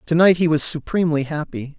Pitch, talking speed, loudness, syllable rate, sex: 155 Hz, 200 wpm, -18 LUFS, 6.0 syllables/s, male